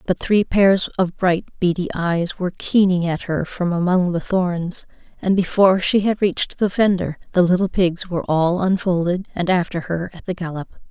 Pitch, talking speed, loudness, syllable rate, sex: 180 Hz, 185 wpm, -19 LUFS, 4.9 syllables/s, female